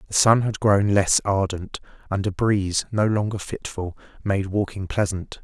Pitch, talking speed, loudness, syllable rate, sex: 100 Hz, 165 wpm, -22 LUFS, 4.6 syllables/s, male